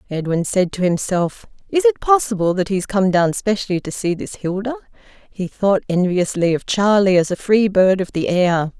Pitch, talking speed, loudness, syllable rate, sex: 195 Hz, 200 wpm, -18 LUFS, 5.1 syllables/s, female